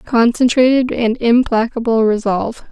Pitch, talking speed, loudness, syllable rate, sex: 235 Hz, 90 wpm, -14 LUFS, 4.7 syllables/s, female